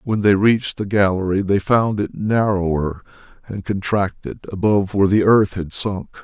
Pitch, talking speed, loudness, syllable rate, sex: 100 Hz, 165 wpm, -18 LUFS, 4.9 syllables/s, male